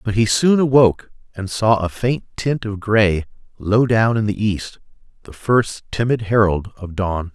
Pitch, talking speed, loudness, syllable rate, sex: 105 Hz, 180 wpm, -18 LUFS, 4.3 syllables/s, male